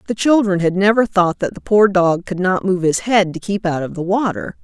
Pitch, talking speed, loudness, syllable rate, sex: 195 Hz, 260 wpm, -16 LUFS, 5.2 syllables/s, female